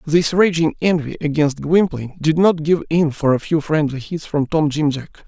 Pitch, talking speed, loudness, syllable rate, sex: 155 Hz, 205 wpm, -18 LUFS, 4.8 syllables/s, male